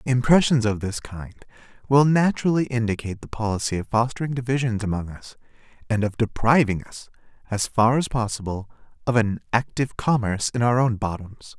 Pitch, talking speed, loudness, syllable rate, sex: 115 Hz, 155 wpm, -22 LUFS, 5.7 syllables/s, male